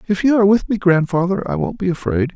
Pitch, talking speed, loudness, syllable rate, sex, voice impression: 170 Hz, 255 wpm, -17 LUFS, 6.4 syllables/s, male, very masculine, very adult-like, old, very thick, slightly relaxed, slightly weak, slightly dark, soft, muffled, fluent, cool, intellectual, very sincere, very calm, very mature, friendly, very reassuring, unique, elegant, very wild, sweet, slightly lively, very kind, slightly modest